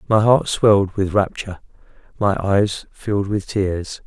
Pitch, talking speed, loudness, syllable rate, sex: 100 Hz, 150 wpm, -19 LUFS, 4.3 syllables/s, male